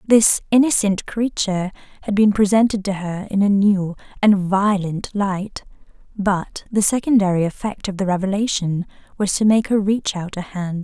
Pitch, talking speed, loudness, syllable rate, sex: 200 Hz, 160 wpm, -19 LUFS, 4.7 syllables/s, female